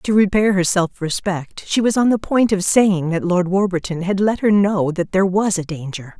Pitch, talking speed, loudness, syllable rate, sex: 190 Hz, 235 wpm, -18 LUFS, 4.9 syllables/s, female